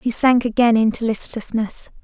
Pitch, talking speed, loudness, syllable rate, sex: 230 Hz, 150 wpm, -19 LUFS, 4.7 syllables/s, female